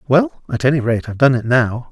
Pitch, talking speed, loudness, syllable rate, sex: 130 Hz, 250 wpm, -16 LUFS, 5.9 syllables/s, male